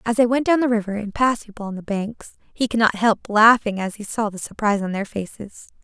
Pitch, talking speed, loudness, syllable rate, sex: 215 Hz, 255 wpm, -20 LUFS, 5.9 syllables/s, female